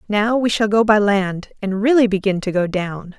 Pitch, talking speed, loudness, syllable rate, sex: 205 Hz, 225 wpm, -18 LUFS, 4.7 syllables/s, female